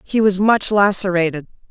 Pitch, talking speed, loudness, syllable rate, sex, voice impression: 195 Hz, 140 wpm, -16 LUFS, 5.0 syllables/s, female, very feminine, very adult-like, slightly middle-aged, thin, slightly tensed, powerful, slightly dark, hard, clear, fluent, slightly cool, intellectual, slightly refreshing, sincere, calm, slightly friendly, slightly reassuring, very unique, elegant, slightly wild, slightly lively, strict, slightly intense, sharp